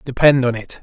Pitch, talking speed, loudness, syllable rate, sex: 130 Hz, 220 wpm, -16 LUFS, 5.5 syllables/s, male